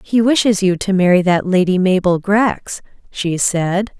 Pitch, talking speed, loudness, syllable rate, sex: 190 Hz, 165 wpm, -15 LUFS, 4.2 syllables/s, female